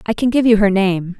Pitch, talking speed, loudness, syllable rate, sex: 205 Hz, 300 wpm, -15 LUFS, 5.6 syllables/s, female